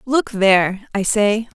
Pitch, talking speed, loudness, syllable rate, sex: 215 Hz, 150 wpm, -17 LUFS, 3.8 syllables/s, female